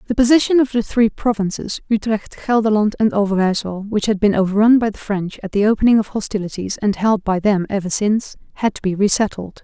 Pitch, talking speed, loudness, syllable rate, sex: 210 Hz, 205 wpm, -18 LUFS, 6.0 syllables/s, female